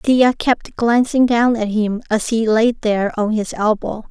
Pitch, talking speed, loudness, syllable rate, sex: 225 Hz, 190 wpm, -17 LUFS, 4.2 syllables/s, female